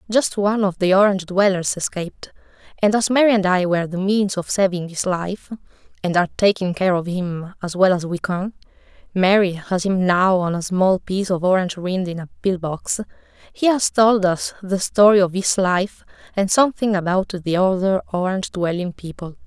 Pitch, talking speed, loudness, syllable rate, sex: 190 Hz, 190 wpm, -19 LUFS, 4.4 syllables/s, female